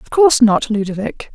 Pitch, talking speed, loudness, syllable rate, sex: 235 Hz, 180 wpm, -14 LUFS, 5.4 syllables/s, female